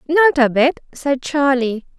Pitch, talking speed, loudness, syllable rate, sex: 275 Hz, 150 wpm, -17 LUFS, 3.7 syllables/s, female